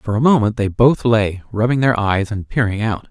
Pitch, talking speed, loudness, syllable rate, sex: 110 Hz, 230 wpm, -17 LUFS, 5.0 syllables/s, male